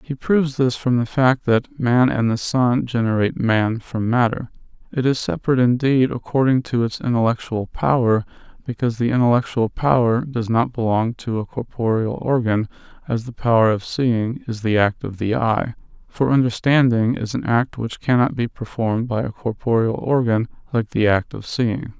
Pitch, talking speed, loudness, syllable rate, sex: 120 Hz, 175 wpm, -20 LUFS, 4.9 syllables/s, male